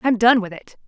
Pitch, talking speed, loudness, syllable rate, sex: 220 Hz, 275 wpm, -17 LUFS, 5.8 syllables/s, female